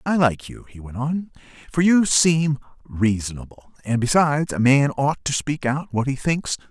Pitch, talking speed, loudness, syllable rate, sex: 140 Hz, 190 wpm, -21 LUFS, 4.6 syllables/s, male